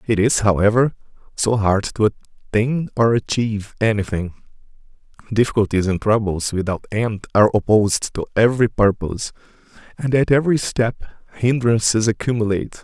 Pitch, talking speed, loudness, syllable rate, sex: 110 Hz, 120 wpm, -19 LUFS, 6.0 syllables/s, male